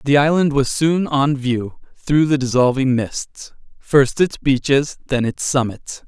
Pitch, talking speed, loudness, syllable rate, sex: 135 Hz, 160 wpm, -18 LUFS, 3.9 syllables/s, male